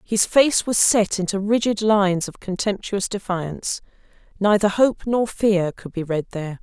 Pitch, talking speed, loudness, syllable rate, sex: 200 Hz, 165 wpm, -20 LUFS, 4.6 syllables/s, female